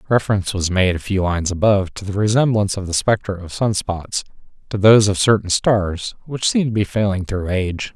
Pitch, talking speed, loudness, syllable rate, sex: 100 Hz, 210 wpm, -18 LUFS, 5.8 syllables/s, male